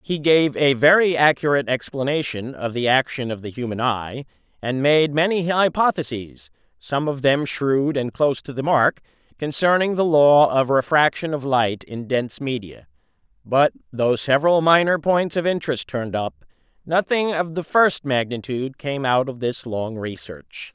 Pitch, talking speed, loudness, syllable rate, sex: 140 Hz, 160 wpm, -20 LUFS, 4.7 syllables/s, male